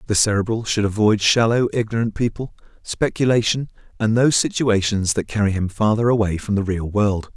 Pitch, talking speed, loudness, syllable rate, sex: 110 Hz, 165 wpm, -19 LUFS, 5.5 syllables/s, male